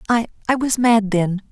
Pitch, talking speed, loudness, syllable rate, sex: 220 Hz, 160 wpm, -18 LUFS, 4.6 syllables/s, female